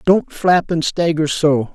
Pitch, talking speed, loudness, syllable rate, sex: 160 Hz, 170 wpm, -16 LUFS, 3.8 syllables/s, male